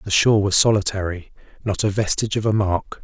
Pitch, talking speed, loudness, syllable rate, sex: 100 Hz, 200 wpm, -19 LUFS, 6.2 syllables/s, male